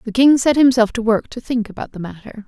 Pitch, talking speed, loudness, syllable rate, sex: 230 Hz, 265 wpm, -16 LUFS, 6.0 syllables/s, female